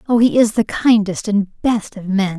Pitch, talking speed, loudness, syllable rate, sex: 210 Hz, 225 wpm, -16 LUFS, 4.4 syllables/s, female